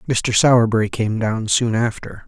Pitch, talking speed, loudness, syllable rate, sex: 110 Hz, 160 wpm, -18 LUFS, 4.8 syllables/s, male